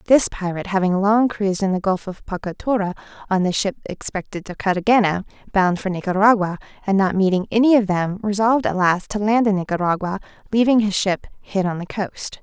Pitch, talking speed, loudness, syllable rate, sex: 195 Hz, 190 wpm, -20 LUFS, 5.8 syllables/s, female